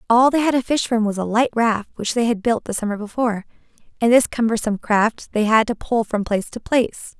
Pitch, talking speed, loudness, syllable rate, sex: 225 Hz, 240 wpm, -19 LUFS, 5.9 syllables/s, female